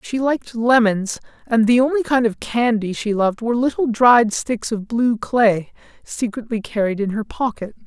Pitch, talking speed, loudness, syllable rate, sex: 230 Hz, 175 wpm, -18 LUFS, 4.8 syllables/s, male